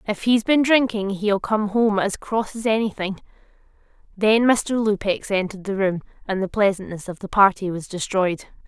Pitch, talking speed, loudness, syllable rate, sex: 205 Hz, 175 wpm, -21 LUFS, 4.8 syllables/s, female